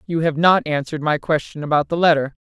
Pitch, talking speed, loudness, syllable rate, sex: 155 Hz, 220 wpm, -18 LUFS, 6.2 syllables/s, female